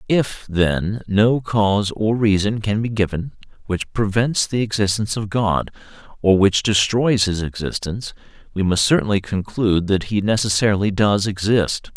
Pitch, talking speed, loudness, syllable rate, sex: 105 Hz, 145 wpm, -19 LUFS, 4.7 syllables/s, male